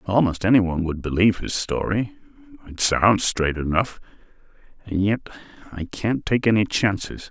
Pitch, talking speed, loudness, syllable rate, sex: 100 Hz, 130 wpm, -22 LUFS, 5.2 syllables/s, male